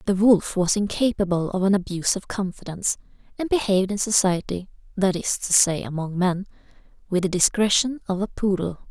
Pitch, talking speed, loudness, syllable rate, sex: 195 Hz, 170 wpm, -22 LUFS, 5.6 syllables/s, female